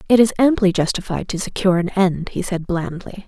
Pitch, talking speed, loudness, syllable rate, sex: 190 Hz, 200 wpm, -19 LUFS, 5.5 syllables/s, female